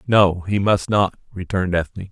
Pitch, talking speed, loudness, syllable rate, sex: 95 Hz, 170 wpm, -19 LUFS, 5.0 syllables/s, male